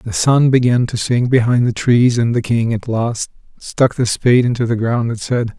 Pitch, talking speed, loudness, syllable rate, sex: 120 Hz, 225 wpm, -15 LUFS, 4.8 syllables/s, male